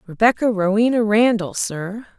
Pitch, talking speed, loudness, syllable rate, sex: 210 Hz, 110 wpm, -18 LUFS, 4.6 syllables/s, female